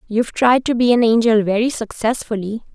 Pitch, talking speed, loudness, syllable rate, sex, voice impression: 230 Hz, 175 wpm, -17 LUFS, 5.6 syllables/s, female, very feminine, very young, very thin, very tensed, powerful, very bright, slightly soft, very clear, slightly fluent, very cute, slightly intellectual, very refreshing, slightly sincere, calm, very friendly, very reassuring, very unique, elegant, slightly wild, very sweet, lively, slightly kind, slightly intense, sharp, very light